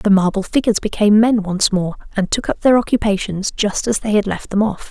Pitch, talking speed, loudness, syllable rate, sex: 205 Hz, 230 wpm, -17 LUFS, 5.9 syllables/s, female